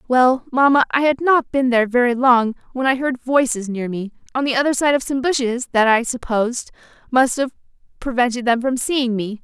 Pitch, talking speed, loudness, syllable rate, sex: 250 Hz, 205 wpm, -18 LUFS, 5.4 syllables/s, female